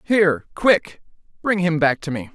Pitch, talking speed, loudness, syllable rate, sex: 165 Hz, 180 wpm, -20 LUFS, 4.6 syllables/s, male